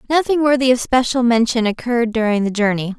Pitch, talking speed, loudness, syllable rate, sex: 240 Hz, 180 wpm, -16 LUFS, 6.1 syllables/s, female